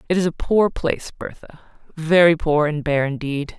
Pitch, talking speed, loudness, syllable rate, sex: 160 Hz, 185 wpm, -19 LUFS, 5.0 syllables/s, female